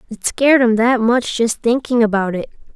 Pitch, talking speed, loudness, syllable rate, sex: 230 Hz, 195 wpm, -15 LUFS, 5.2 syllables/s, female